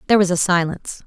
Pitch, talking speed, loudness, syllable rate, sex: 180 Hz, 225 wpm, -18 LUFS, 8.1 syllables/s, female